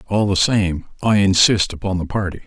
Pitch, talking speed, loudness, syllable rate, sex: 95 Hz, 195 wpm, -17 LUFS, 5.4 syllables/s, male